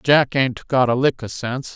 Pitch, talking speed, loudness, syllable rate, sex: 130 Hz, 240 wpm, -19 LUFS, 4.7 syllables/s, male